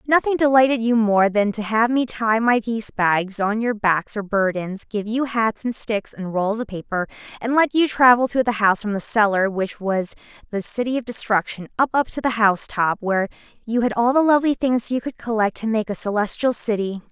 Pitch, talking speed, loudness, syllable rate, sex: 220 Hz, 215 wpm, -20 LUFS, 5.3 syllables/s, female